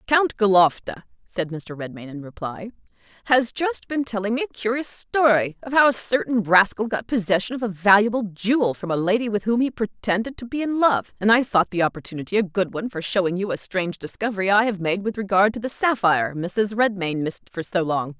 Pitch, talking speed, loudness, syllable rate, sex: 205 Hz, 215 wpm, -22 LUFS, 5.8 syllables/s, female